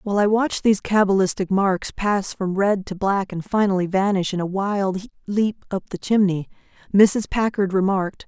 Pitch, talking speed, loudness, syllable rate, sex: 195 Hz, 175 wpm, -21 LUFS, 5.0 syllables/s, female